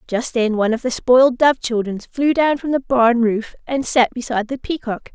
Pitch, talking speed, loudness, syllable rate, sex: 245 Hz, 220 wpm, -18 LUFS, 5.3 syllables/s, female